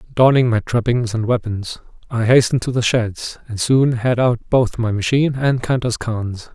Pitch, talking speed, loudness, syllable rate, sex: 120 Hz, 185 wpm, -18 LUFS, 4.7 syllables/s, male